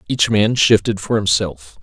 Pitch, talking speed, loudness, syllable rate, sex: 105 Hz, 165 wpm, -16 LUFS, 4.3 syllables/s, male